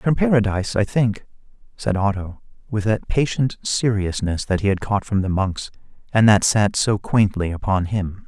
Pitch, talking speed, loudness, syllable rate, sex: 105 Hz, 175 wpm, -20 LUFS, 4.7 syllables/s, male